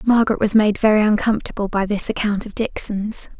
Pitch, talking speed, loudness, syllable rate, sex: 210 Hz, 175 wpm, -19 LUFS, 5.9 syllables/s, female